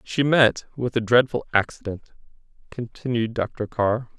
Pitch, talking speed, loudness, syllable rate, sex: 120 Hz, 130 wpm, -22 LUFS, 4.2 syllables/s, male